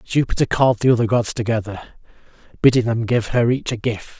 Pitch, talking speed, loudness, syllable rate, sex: 115 Hz, 185 wpm, -19 LUFS, 6.3 syllables/s, male